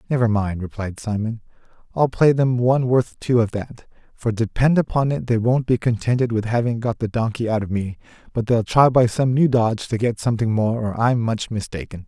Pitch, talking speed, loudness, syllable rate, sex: 115 Hz, 215 wpm, -20 LUFS, 5.4 syllables/s, male